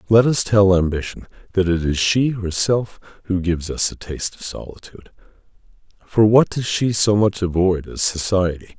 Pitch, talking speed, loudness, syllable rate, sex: 95 Hz, 170 wpm, -19 LUFS, 5.1 syllables/s, male